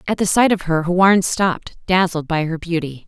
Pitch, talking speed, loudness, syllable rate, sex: 175 Hz, 215 wpm, -17 LUFS, 5.0 syllables/s, female